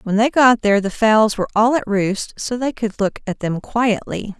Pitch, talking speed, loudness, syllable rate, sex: 220 Hz, 230 wpm, -18 LUFS, 4.9 syllables/s, female